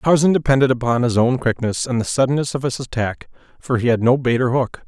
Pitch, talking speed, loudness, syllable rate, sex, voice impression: 125 Hz, 235 wpm, -18 LUFS, 6.0 syllables/s, male, masculine, adult-like, slightly muffled, sincere, calm, friendly, kind